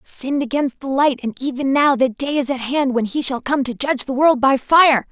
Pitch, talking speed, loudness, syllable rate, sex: 265 Hz, 260 wpm, -18 LUFS, 5.3 syllables/s, female